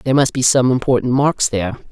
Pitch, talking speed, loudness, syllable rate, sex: 125 Hz, 220 wpm, -16 LUFS, 6.4 syllables/s, female